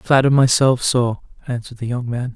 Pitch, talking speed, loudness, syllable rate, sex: 125 Hz, 205 wpm, -18 LUFS, 5.8 syllables/s, male